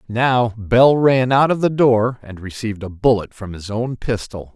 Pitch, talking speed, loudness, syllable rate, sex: 115 Hz, 200 wpm, -17 LUFS, 4.4 syllables/s, male